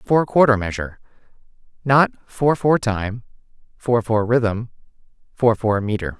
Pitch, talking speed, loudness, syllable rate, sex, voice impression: 115 Hz, 125 wpm, -19 LUFS, 3.8 syllables/s, male, very masculine, very adult-like, middle-aged, very thick, tensed, powerful, slightly bright, slightly soft, very clear, very fluent, slightly raspy, very cool, very intellectual, sincere, calm, mature, friendly, very reassuring, very unique, elegant, wild, slightly sweet, lively, very kind, modest